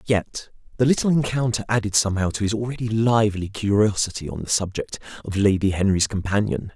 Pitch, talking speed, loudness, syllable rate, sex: 105 Hz, 160 wpm, -22 LUFS, 6.0 syllables/s, male